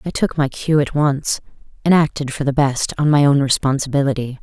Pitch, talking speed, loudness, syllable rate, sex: 140 Hz, 205 wpm, -17 LUFS, 5.5 syllables/s, female